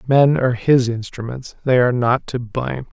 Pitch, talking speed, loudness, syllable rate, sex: 125 Hz, 180 wpm, -18 LUFS, 5.3 syllables/s, male